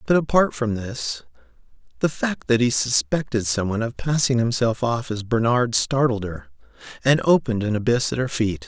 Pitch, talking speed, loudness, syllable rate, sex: 120 Hz, 175 wpm, -21 LUFS, 5.1 syllables/s, male